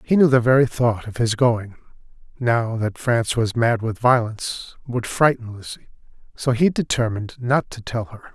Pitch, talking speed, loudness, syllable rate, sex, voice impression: 120 Hz, 180 wpm, -20 LUFS, 4.9 syllables/s, male, masculine, middle-aged, powerful, hard, raspy, calm, mature, slightly friendly, wild, lively, strict, slightly intense